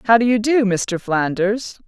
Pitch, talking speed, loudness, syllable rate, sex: 210 Hz, 160 wpm, -18 LUFS, 3.6 syllables/s, female